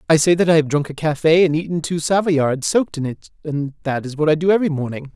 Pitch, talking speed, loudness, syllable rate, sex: 155 Hz, 270 wpm, -18 LUFS, 6.4 syllables/s, male